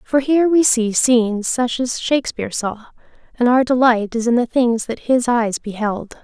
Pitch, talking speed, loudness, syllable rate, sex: 240 Hz, 190 wpm, -17 LUFS, 4.8 syllables/s, female